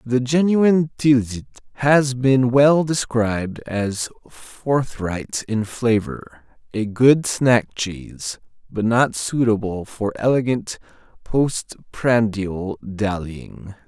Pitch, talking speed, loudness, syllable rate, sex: 115 Hz, 100 wpm, -20 LUFS, 3.1 syllables/s, male